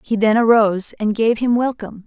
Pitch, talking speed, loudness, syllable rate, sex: 220 Hz, 205 wpm, -17 LUFS, 5.7 syllables/s, female